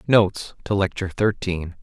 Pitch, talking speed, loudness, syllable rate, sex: 100 Hz, 130 wpm, -22 LUFS, 5.3 syllables/s, male